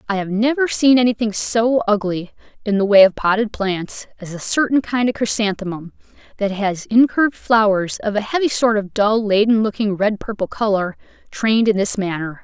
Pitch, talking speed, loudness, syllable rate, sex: 215 Hz, 185 wpm, -18 LUFS, 5.2 syllables/s, female